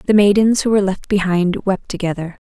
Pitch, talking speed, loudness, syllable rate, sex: 195 Hz, 195 wpm, -17 LUFS, 5.8 syllables/s, female